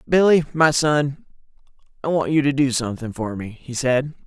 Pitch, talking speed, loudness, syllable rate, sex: 140 Hz, 185 wpm, -20 LUFS, 5.1 syllables/s, male